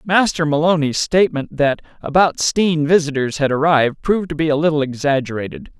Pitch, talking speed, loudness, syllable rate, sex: 155 Hz, 155 wpm, -17 LUFS, 5.7 syllables/s, male